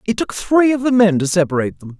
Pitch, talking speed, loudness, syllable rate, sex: 190 Hz, 270 wpm, -16 LUFS, 6.5 syllables/s, female